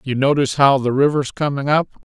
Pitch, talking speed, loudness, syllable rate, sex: 140 Hz, 195 wpm, -17 LUFS, 6.1 syllables/s, male